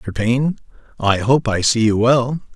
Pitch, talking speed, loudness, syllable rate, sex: 120 Hz, 190 wpm, -17 LUFS, 4.7 syllables/s, male